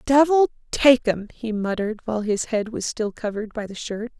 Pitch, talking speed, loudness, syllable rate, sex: 230 Hz, 200 wpm, -22 LUFS, 5.5 syllables/s, female